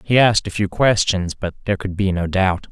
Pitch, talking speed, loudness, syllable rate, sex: 95 Hz, 245 wpm, -19 LUFS, 5.7 syllables/s, male